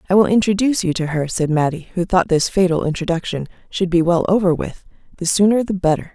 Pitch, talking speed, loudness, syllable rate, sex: 180 Hz, 215 wpm, -18 LUFS, 6.1 syllables/s, female